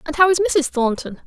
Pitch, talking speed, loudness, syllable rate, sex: 305 Hz, 240 wpm, -18 LUFS, 5.3 syllables/s, female